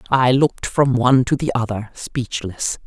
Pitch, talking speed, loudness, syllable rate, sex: 125 Hz, 170 wpm, -19 LUFS, 4.7 syllables/s, female